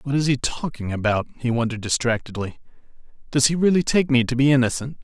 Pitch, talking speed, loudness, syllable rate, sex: 130 Hz, 190 wpm, -21 LUFS, 6.4 syllables/s, male